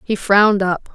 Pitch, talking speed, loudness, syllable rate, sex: 195 Hz, 190 wpm, -15 LUFS, 5.3 syllables/s, female